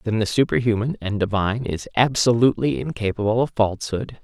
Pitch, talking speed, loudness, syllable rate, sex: 115 Hz, 140 wpm, -21 LUFS, 6.0 syllables/s, male